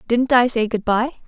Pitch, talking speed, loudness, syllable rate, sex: 240 Hz, 235 wpm, -18 LUFS, 5.3 syllables/s, female